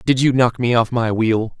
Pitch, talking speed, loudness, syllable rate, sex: 115 Hz, 265 wpm, -17 LUFS, 4.7 syllables/s, male